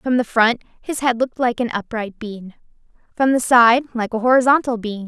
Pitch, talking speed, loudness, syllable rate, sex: 235 Hz, 200 wpm, -18 LUFS, 5.4 syllables/s, female